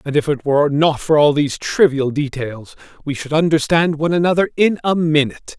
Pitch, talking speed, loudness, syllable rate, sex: 150 Hz, 195 wpm, -16 LUFS, 5.7 syllables/s, male